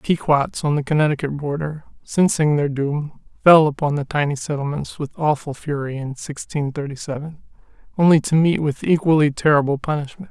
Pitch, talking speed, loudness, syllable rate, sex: 150 Hz, 165 wpm, -20 LUFS, 5.5 syllables/s, male